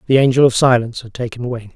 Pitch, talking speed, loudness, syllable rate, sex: 120 Hz, 240 wpm, -15 LUFS, 7.0 syllables/s, male